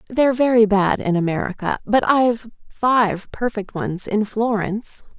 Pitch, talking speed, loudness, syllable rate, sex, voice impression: 215 Hz, 140 wpm, -19 LUFS, 4.6 syllables/s, female, very feminine, slightly adult-like, slightly fluent, slightly refreshing, slightly calm, friendly, kind